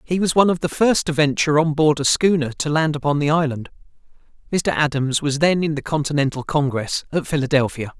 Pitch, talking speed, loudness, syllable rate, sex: 150 Hz, 205 wpm, -19 LUFS, 6.0 syllables/s, male